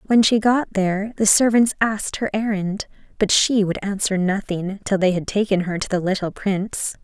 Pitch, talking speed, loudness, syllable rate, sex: 200 Hz, 195 wpm, -20 LUFS, 5.1 syllables/s, female